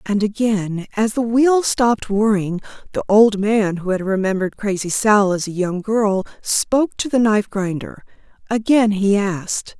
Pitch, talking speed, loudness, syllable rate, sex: 210 Hz, 165 wpm, -18 LUFS, 4.6 syllables/s, female